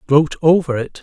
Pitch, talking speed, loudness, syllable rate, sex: 150 Hz, 175 wpm, -16 LUFS, 4.8 syllables/s, male